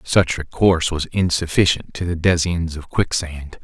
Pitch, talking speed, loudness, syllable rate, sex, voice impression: 85 Hz, 150 wpm, -19 LUFS, 4.9 syllables/s, male, very masculine, very adult-like, slightly old, very thick, relaxed, weak, dark, slightly hard, muffled, slightly fluent, cool, intellectual, very sincere, very calm, very mature, friendly, very reassuring, unique, elegant, slightly wild, slightly sweet, slightly lively, very kind, modest